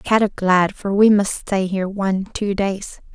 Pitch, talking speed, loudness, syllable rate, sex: 195 Hz, 190 wpm, -19 LUFS, 4.4 syllables/s, female